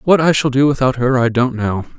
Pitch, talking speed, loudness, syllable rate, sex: 130 Hz, 270 wpm, -15 LUFS, 5.6 syllables/s, male